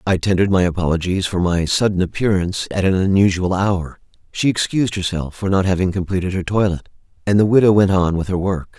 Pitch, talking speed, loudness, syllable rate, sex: 95 Hz, 200 wpm, -18 LUFS, 6.0 syllables/s, male